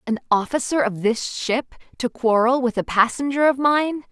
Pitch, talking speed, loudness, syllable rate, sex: 250 Hz, 175 wpm, -20 LUFS, 4.7 syllables/s, female